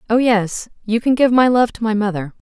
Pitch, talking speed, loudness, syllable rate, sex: 225 Hz, 220 wpm, -16 LUFS, 5.5 syllables/s, female